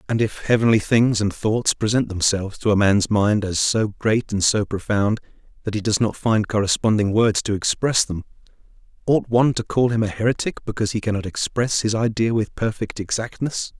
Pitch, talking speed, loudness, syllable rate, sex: 110 Hz, 190 wpm, -20 LUFS, 5.3 syllables/s, male